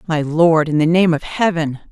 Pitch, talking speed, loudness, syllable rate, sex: 160 Hz, 220 wpm, -16 LUFS, 4.7 syllables/s, female